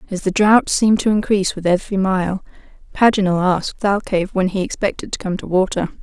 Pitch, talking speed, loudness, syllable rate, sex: 190 Hz, 190 wpm, -18 LUFS, 6.2 syllables/s, female